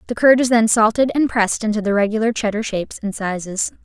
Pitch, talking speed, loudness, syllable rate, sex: 220 Hz, 220 wpm, -18 LUFS, 6.3 syllables/s, female